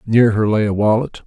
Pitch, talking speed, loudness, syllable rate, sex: 110 Hz, 235 wpm, -16 LUFS, 5.3 syllables/s, male